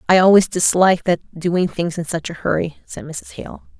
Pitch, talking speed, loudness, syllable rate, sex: 175 Hz, 205 wpm, -17 LUFS, 4.9 syllables/s, female